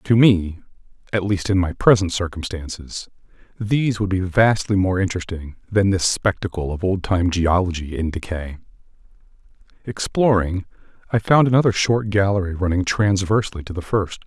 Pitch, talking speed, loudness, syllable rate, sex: 95 Hz, 140 wpm, -20 LUFS, 5.2 syllables/s, male